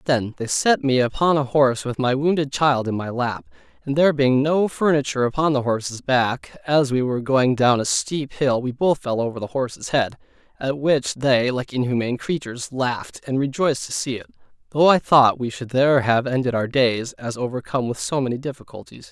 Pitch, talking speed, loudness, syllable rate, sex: 130 Hz, 205 wpm, -21 LUFS, 5.4 syllables/s, male